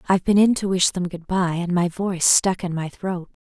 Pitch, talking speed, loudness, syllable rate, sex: 180 Hz, 260 wpm, -21 LUFS, 5.4 syllables/s, female